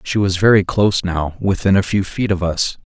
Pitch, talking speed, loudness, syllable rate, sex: 95 Hz, 230 wpm, -17 LUFS, 5.2 syllables/s, male